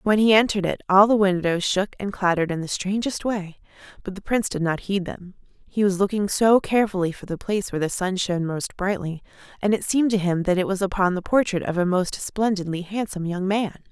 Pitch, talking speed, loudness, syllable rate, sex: 190 Hz, 230 wpm, -22 LUFS, 6.0 syllables/s, female